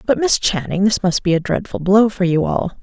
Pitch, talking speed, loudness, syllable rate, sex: 195 Hz, 255 wpm, -17 LUFS, 5.2 syllables/s, female